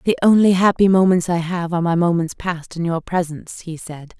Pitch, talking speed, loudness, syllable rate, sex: 175 Hz, 215 wpm, -17 LUFS, 5.8 syllables/s, female